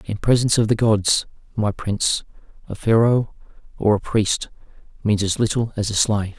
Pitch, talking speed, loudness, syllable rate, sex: 110 Hz, 170 wpm, -20 LUFS, 5.2 syllables/s, male